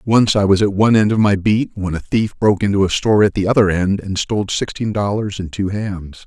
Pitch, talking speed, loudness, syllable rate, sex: 100 Hz, 260 wpm, -16 LUFS, 5.8 syllables/s, male